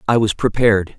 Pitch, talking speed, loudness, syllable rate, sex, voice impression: 110 Hz, 185 wpm, -16 LUFS, 6.0 syllables/s, male, very masculine, very adult-like, middle-aged, thick, slightly tensed, powerful, slightly bright, hard, clear, fluent, cool, very intellectual, refreshing, very sincere, calm, slightly mature, friendly, reassuring, slightly unique, elegant, slightly wild, sweet, slightly lively, kind, slightly modest